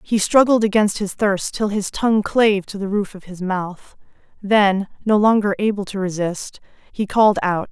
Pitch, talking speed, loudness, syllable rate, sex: 200 Hz, 185 wpm, -18 LUFS, 4.8 syllables/s, female